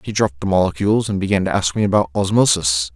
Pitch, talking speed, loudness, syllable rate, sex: 95 Hz, 225 wpm, -17 LUFS, 6.8 syllables/s, male